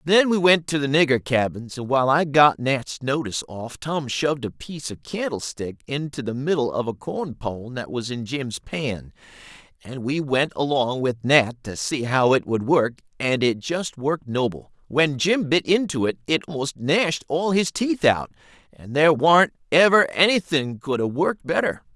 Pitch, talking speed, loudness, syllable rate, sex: 140 Hz, 190 wpm, -22 LUFS, 4.6 syllables/s, male